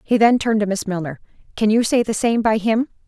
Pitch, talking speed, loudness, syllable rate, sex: 220 Hz, 235 wpm, -18 LUFS, 6.1 syllables/s, female